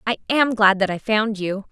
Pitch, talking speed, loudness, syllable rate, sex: 210 Hz, 245 wpm, -19 LUFS, 4.9 syllables/s, female